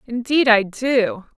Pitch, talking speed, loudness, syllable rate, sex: 235 Hz, 130 wpm, -18 LUFS, 3.4 syllables/s, female